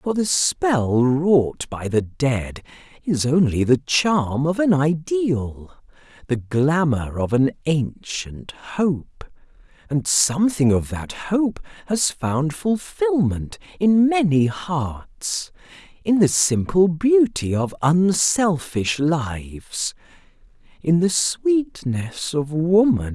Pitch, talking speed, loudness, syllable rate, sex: 155 Hz, 105 wpm, -20 LUFS, 3.0 syllables/s, male